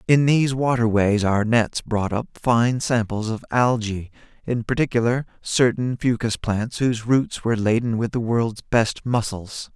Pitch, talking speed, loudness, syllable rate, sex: 115 Hz, 155 wpm, -21 LUFS, 4.4 syllables/s, male